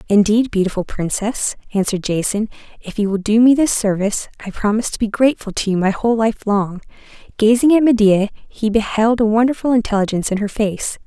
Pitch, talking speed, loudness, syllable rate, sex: 215 Hz, 185 wpm, -17 LUFS, 6.1 syllables/s, female